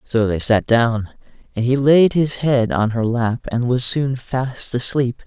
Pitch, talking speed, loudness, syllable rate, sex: 125 Hz, 195 wpm, -18 LUFS, 3.8 syllables/s, male